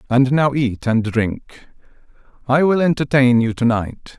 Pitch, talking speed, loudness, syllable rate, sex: 130 Hz, 160 wpm, -17 LUFS, 4.1 syllables/s, male